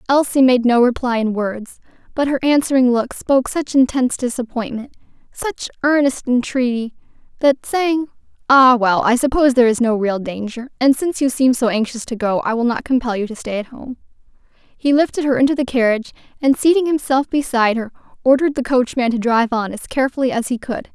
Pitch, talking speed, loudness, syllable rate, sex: 250 Hz, 190 wpm, -17 LUFS, 5.8 syllables/s, female